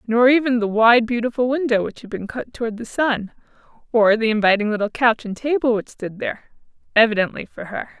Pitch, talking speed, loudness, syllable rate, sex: 230 Hz, 195 wpm, -19 LUFS, 5.7 syllables/s, female